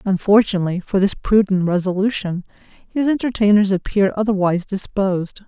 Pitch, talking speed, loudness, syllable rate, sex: 200 Hz, 110 wpm, -18 LUFS, 5.9 syllables/s, female